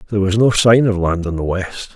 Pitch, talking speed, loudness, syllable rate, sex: 100 Hz, 275 wpm, -15 LUFS, 5.9 syllables/s, male